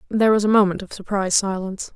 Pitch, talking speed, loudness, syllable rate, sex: 200 Hz, 215 wpm, -20 LUFS, 7.5 syllables/s, female